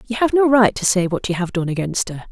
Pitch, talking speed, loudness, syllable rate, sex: 205 Hz, 310 wpm, -18 LUFS, 6.0 syllables/s, female